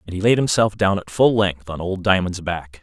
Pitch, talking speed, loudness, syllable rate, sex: 95 Hz, 255 wpm, -19 LUFS, 5.2 syllables/s, male